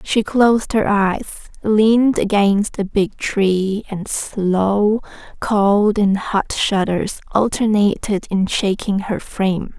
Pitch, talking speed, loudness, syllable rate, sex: 205 Hz, 125 wpm, -17 LUFS, 3.4 syllables/s, female